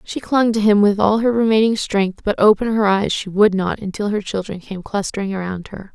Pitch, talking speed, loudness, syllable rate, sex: 205 Hz, 230 wpm, -18 LUFS, 5.3 syllables/s, female